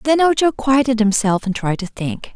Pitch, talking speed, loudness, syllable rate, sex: 235 Hz, 205 wpm, -17 LUFS, 4.9 syllables/s, female